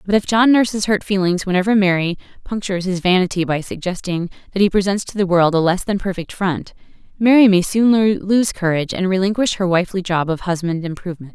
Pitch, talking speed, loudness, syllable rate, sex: 190 Hz, 195 wpm, -17 LUFS, 5.9 syllables/s, female